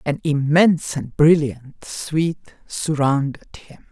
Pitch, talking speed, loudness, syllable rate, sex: 150 Hz, 105 wpm, -19 LUFS, 3.9 syllables/s, female